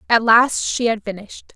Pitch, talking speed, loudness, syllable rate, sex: 225 Hz, 195 wpm, -16 LUFS, 5.4 syllables/s, female